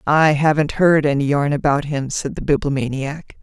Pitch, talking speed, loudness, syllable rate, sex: 145 Hz, 175 wpm, -18 LUFS, 4.9 syllables/s, female